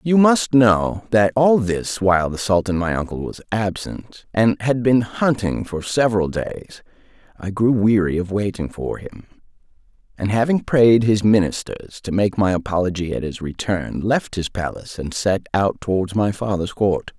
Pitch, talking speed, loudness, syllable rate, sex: 105 Hz, 170 wpm, -19 LUFS, 4.6 syllables/s, male